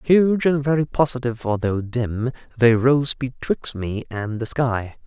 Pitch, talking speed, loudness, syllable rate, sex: 125 Hz, 155 wpm, -21 LUFS, 4.1 syllables/s, male